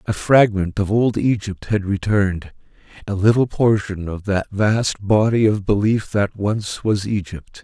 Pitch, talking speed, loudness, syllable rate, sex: 100 Hz, 150 wpm, -19 LUFS, 4.2 syllables/s, male